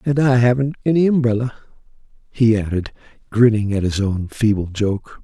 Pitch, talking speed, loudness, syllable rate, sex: 115 Hz, 150 wpm, -18 LUFS, 5.3 syllables/s, male